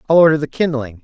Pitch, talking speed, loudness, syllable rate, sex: 145 Hz, 230 wpm, -15 LUFS, 7.1 syllables/s, male